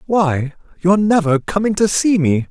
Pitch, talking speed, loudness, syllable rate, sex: 180 Hz, 145 wpm, -16 LUFS, 4.2 syllables/s, male